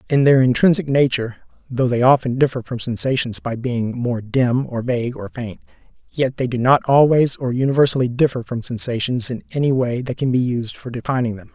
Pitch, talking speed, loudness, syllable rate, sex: 125 Hz, 200 wpm, -19 LUFS, 5.5 syllables/s, male